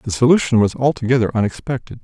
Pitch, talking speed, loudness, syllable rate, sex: 120 Hz, 150 wpm, -17 LUFS, 6.9 syllables/s, male